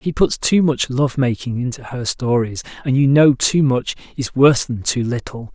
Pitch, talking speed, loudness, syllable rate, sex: 130 Hz, 195 wpm, -17 LUFS, 4.9 syllables/s, male